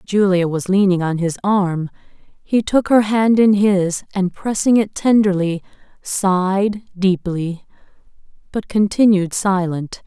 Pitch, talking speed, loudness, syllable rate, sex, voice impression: 195 Hz, 125 wpm, -17 LUFS, 3.8 syllables/s, female, very feminine, very adult-like, middle-aged, thin, tensed, powerful, bright, slightly hard, very clear, fluent, slightly cute, cool, very intellectual, very refreshing, sincere, calm, slightly friendly, reassuring, unique, elegant, slightly wild, very lively, strict, intense, slightly sharp